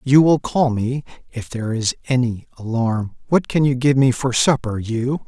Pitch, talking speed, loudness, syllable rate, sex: 125 Hz, 180 wpm, -19 LUFS, 4.6 syllables/s, male